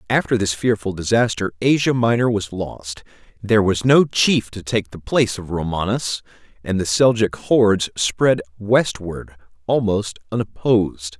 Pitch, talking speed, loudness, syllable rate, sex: 105 Hz, 140 wpm, -19 LUFS, 4.6 syllables/s, male